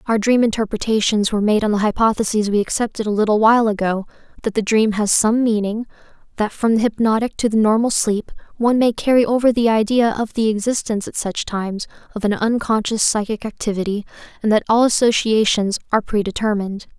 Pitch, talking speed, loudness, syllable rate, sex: 215 Hz, 180 wpm, -18 LUFS, 6.1 syllables/s, female